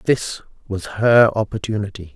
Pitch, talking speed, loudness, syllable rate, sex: 105 Hz, 110 wpm, -19 LUFS, 4.6 syllables/s, male